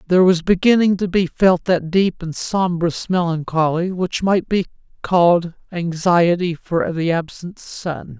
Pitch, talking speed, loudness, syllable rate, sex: 175 Hz, 145 wpm, -18 LUFS, 4.1 syllables/s, male